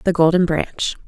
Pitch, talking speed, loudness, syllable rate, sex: 165 Hz, 165 wpm, -18 LUFS, 4.7 syllables/s, female